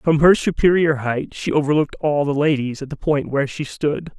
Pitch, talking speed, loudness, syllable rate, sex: 150 Hz, 215 wpm, -19 LUFS, 5.5 syllables/s, male